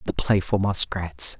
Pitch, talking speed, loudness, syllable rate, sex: 90 Hz, 130 wpm, -21 LUFS, 4.0 syllables/s, female